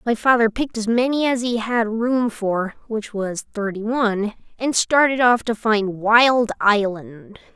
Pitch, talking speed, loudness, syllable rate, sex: 225 Hz, 165 wpm, -19 LUFS, 4.1 syllables/s, female